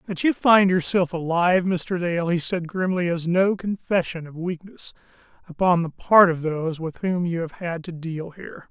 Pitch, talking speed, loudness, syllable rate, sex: 175 Hz, 195 wpm, -22 LUFS, 4.8 syllables/s, male